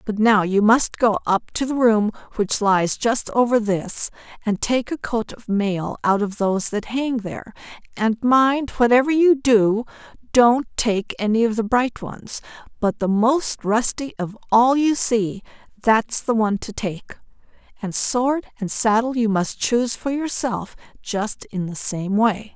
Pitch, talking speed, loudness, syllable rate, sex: 225 Hz, 175 wpm, -20 LUFS, 4.0 syllables/s, female